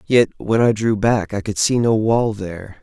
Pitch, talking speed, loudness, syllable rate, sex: 105 Hz, 235 wpm, -18 LUFS, 4.6 syllables/s, male